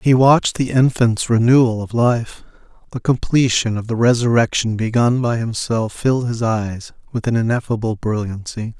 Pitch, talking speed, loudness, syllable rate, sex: 115 Hz, 150 wpm, -17 LUFS, 4.8 syllables/s, male